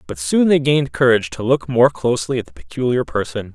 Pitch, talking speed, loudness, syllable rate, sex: 120 Hz, 220 wpm, -17 LUFS, 6.2 syllables/s, male